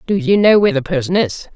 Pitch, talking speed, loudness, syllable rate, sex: 180 Hz, 270 wpm, -14 LUFS, 6.6 syllables/s, female